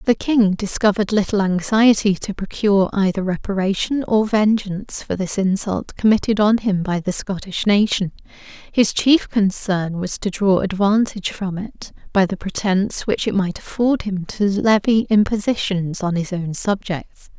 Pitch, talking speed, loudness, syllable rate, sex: 200 Hz, 155 wpm, -19 LUFS, 4.6 syllables/s, female